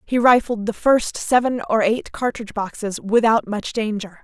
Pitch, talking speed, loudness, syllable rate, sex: 220 Hz, 170 wpm, -20 LUFS, 4.7 syllables/s, female